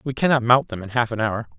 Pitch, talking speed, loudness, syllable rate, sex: 120 Hz, 265 wpm, -20 LUFS, 6.3 syllables/s, male